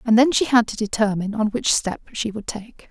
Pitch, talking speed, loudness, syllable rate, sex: 220 Hz, 250 wpm, -21 LUFS, 5.5 syllables/s, female